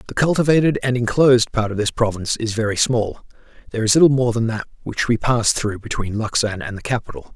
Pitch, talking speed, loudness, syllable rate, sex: 120 Hz, 210 wpm, -19 LUFS, 6.3 syllables/s, male